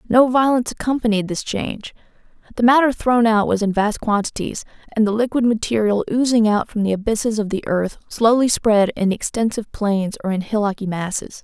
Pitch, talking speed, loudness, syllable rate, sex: 220 Hz, 180 wpm, -19 LUFS, 5.6 syllables/s, female